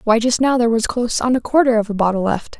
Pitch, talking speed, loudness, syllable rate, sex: 230 Hz, 300 wpm, -17 LUFS, 6.8 syllables/s, female